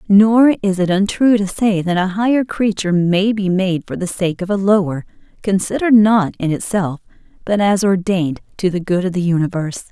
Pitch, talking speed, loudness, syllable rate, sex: 190 Hz, 195 wpm, -16 LUFS, 5.3 syllables/s, female